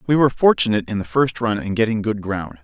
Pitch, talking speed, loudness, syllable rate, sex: 110 Hz, 250 wpm, -19 LUFS, 6.5 syllables/s, male